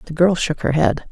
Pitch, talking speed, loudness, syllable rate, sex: 165 Hz, 270 wpm, -18 LUFS, 5.7 syllables/s, female